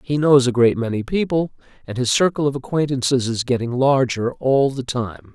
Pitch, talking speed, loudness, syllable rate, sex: 130 Hz, 190 wpm, -19 LUFS, 5.1 syllables/s, male